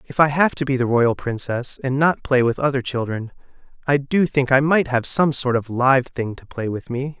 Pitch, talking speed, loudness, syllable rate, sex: 130 Hz, 240 wpm, -20 LUFS, 5.0 syllables/s, male